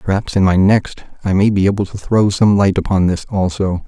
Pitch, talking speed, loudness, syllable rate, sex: 95 Hz, 235 wpm, -15 LUFS, 5.5 syllables/s, male